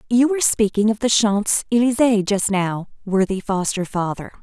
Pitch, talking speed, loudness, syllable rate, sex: 210 Hz, 165 wpm, -19 LUFS, 4.8 syllables/s, female